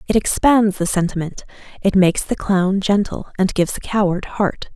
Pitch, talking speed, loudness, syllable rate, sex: 195 Hz, 175 wpm, -18 LUFS, 5.1 syllables/s, female